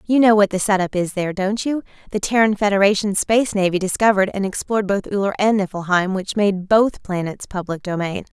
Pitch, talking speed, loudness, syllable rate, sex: 200 Hz, 195 wpm, -19 LUFS, 5.8 syllables/s, female